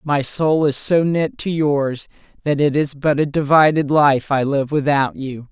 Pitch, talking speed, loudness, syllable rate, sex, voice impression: 145 Hz, 195 wpm, -17 LUFS, 4.2 syllables/s, female, feminine, middle-aged, slightly powerful, slightly intellectual, slightly strict, slightly sharp